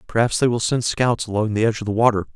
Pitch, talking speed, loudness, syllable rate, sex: 115 Hz, 280 wpm, -20 LUFS, 7.0 syllables/s, male